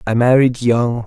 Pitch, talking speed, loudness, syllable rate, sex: 120 Hz, 170 wpm, -14 LUFS, 4.3 syllables/s, male